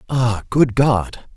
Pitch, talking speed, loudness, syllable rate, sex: 120 Hz, 130 wpm, -17 LUFS, 2.9 syllables/s, male